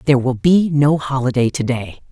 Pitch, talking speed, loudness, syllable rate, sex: 135 Hz, 200 wpm, -16 LUFS, 5.3 syllables/s, female